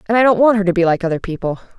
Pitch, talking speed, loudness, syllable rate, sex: 195 Hz, 335 wpm, -16 LUFS, 8.2 syllables/s, female